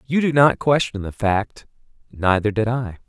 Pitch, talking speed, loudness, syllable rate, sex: 115 Hz, 175 wpm, -19 LUFS, 4.4 syllables/s, male